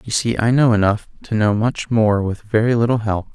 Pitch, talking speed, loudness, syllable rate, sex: 110 Hz, 235 wpm, -18 LUFS, 5.2 syllables/s, male